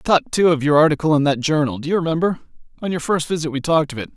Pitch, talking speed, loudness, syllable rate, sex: 155 Hz, 290 wpm, -18 LUFS, 7.7 syllables/s, male